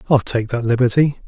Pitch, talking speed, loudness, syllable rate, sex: 125 Hz, 190 wpm, -17 LUFS, 5.7 syllables/s, male